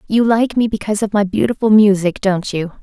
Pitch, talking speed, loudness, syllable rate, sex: 205 Hz, 210 wpm, -15 LUFS, 5.7 syllables/s, female